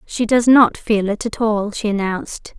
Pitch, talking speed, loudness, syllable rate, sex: 220 Hz, 210 wpm, -17 LUFS, 4.6 syllables/s, female